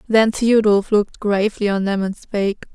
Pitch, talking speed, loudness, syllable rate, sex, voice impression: 205 Hz, 175 wpm, -18 LUFS, 5.1 syllables/s, female, feminine, slightly adult-like, slightly cute, intellectual, slightly sweet